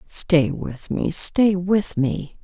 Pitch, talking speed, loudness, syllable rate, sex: 175 Hz, 150 wpm, -20 LUFS, 2.6 syllables/s, female